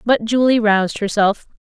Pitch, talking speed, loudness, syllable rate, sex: 220 Hz, 150 wpm, -16 LUFS, 5.0 syllables/s, female